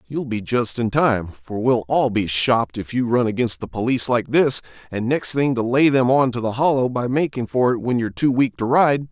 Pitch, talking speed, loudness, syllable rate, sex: 120 Hz, 250 wpm, -20 LUFS, 5.2 syllables/s, male